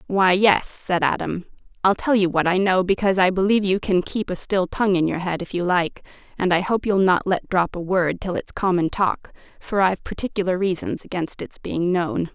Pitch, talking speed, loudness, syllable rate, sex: 185 Hz, 225 wpm, -21 LUFS, 5.3 syllables/s, female